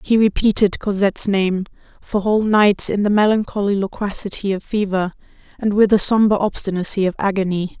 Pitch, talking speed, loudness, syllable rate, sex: 200 Hz, 155 wpm, -18 LUFS, 5.5 syllables/s, female